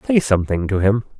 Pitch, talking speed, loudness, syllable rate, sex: 110 Hz, 200 wpm, -18 LUFS, 6.4 syllables/s, male